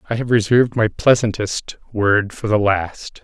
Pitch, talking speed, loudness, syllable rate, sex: 110 Hz, 165 wpm, -17 LUFS, 4.5 syllables/s, male